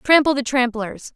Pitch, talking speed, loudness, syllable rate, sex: 255 Hz, 155 wpm, -19 LUFS, 5.8 syllables/s, female